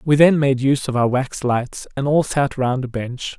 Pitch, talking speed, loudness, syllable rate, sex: 135 Hz, 250 wpm, -19 LUFS, 4.7 syllables/s, male